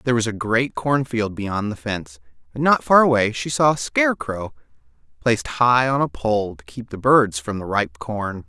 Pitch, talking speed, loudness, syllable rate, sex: 115 Hz, 205 wpm, -20 LUFS, 4.9 syllables/s, male